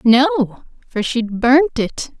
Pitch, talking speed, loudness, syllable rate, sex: 245 Hz, 135 wpm, -17 LUFS, 2.8 syllables/s, female